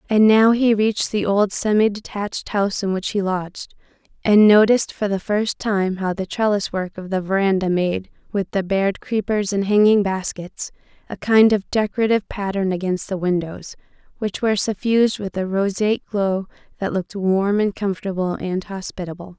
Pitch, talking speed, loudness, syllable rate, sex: 200 Hz, 175 wpm, -20 LUFS, 5.2 syllables/s, female